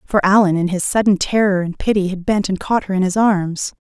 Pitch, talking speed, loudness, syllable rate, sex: 195 Hz, 245 wpm, -17 LUFS, 5.5 syllables/s, female